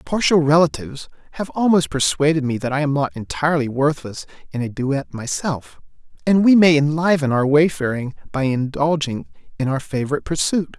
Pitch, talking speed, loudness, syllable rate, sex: 145 Hz, 155 wpm, -19 LUFS, 5.4 syllables/s, male